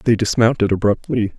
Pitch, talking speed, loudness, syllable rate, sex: 110 Hz, 130 wpm, -17 LUFS, 5.3 syllables/s, male